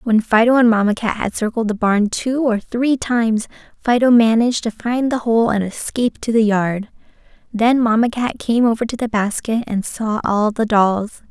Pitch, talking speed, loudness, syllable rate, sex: 225 Hz, 195 wpm, -17 LUFS, 4.8 syllables/s, female